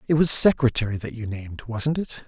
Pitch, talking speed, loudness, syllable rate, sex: 125 Hz, 210 wpm, -21 LUFS, 5.7 syllables/s, male